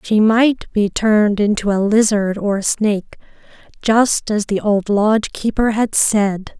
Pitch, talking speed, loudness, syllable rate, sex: 210 Hz, 165 wpm, -16 LUFS, 4.1 syllables/s, female